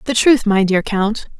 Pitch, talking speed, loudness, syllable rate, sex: 215 Hz, 215 wpm, -15 LUFS, 4.2 syllables/s, female